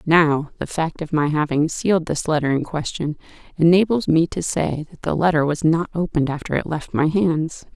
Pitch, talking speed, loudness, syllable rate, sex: 160 Hz, 210 wpm, -20 LUFS, 5.3 syllables/s, female